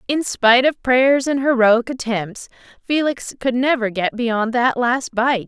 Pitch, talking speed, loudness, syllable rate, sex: 245 Hz, 165 wpm, -18 LUFS, 4.1 syllables/s, female